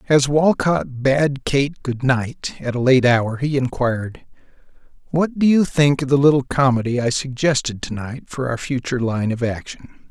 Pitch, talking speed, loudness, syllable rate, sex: 130 Hz, 180 wpm, -19 LUFS, 4.6 syllables/s, male